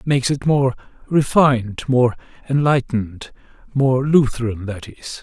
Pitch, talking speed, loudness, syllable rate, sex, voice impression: 130 Hz, 125 wpm, -18 LUFS, 4.7 syllables/s, male, masculine, middle-aged, thick, tensed, powerful, soft, cool, intellectual, slightly friendly, wild, lively, slightly kind